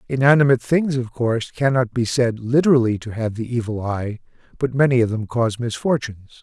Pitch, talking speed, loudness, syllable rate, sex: 120 Hz, 175 wpm, -20 LUFS, 6.0 syllables/s, male